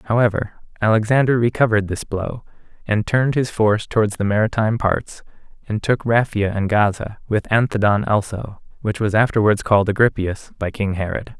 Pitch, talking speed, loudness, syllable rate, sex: 110 Hz, 155 wpm, -19 LUFS, 5.4 syllables/s, male